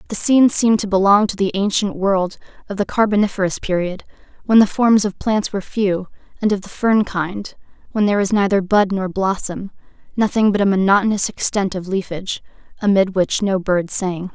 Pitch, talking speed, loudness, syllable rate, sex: 200 Hz, 185 wpm, -18 LUFS, 5.5 syllables/s, female